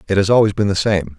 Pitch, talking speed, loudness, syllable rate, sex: 100 Hz, 305 wpm, -16 LUFS, 6.9 syllables/s, male